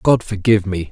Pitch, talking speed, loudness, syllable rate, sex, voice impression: 100 Hz, 195 wpm, -17 LUFS, 6.2 syllables/s, male, masculine, adult-like, relaxed, soft, slightly halting, intellectual, calm, friendly, reassuring, wild, kind, modest